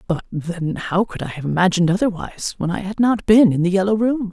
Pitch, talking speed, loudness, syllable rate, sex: 190 Hz, 235 wpm, -19 LUFS, 5.9 syllables/s, female